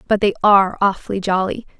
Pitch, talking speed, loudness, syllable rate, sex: 200 Hz, 165 wpm, -17 LUFS, 6.5 syllables/s, female